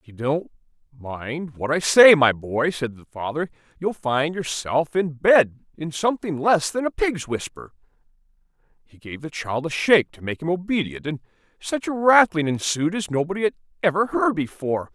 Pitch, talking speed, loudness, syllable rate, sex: 160 Hz, 175 wpm, -22 LUFS, 4.8 syllables/s, male